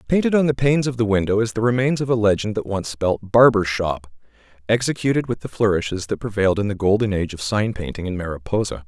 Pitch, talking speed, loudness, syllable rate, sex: 110 Hz, 225 wpm, -20 LUFS, 6.4 syllables/s, male